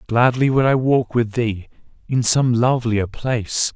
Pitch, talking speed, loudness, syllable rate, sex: 120 Hz, 145 wpm, -18 LUFS, 4.4 syllables/s, male